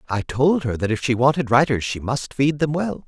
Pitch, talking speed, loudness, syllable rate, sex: 135 Hz, 255 wpm, -20 LUFS, 5.2 syllables/s, male